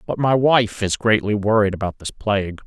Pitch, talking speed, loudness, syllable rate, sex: 105 Hz, 205 wpm, -19 LUFS, 5.2 syllables/s, male